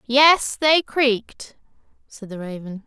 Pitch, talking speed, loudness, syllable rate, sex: 245 Hz, 125 wpm, -18 LUFS, 3.6 syllables/s, female